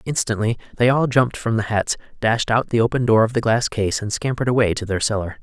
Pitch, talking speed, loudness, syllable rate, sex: 115 Hz, 245 wpm, -20 LUFS, 6.2 syllables/s, male